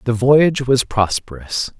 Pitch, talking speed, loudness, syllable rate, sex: 120 Hz, 135 wpm, -16 LUFS, 4.3 syllables/s, male